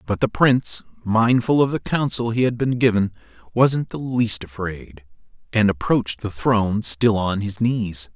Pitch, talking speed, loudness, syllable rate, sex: 110 Hz, 170 wpm, -20 LUFS, 4.5 syllables/s, male